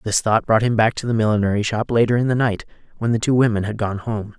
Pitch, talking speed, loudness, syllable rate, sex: 110 Hz, 275 wpm, -19 LUFS, 6.4 syllables/s, male